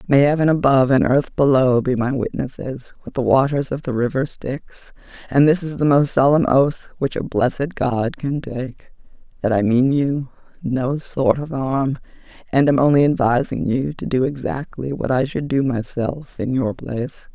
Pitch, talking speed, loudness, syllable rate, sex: 135 Hz, 175 wpm, -19 LUFS, 4.7 syllables/s, female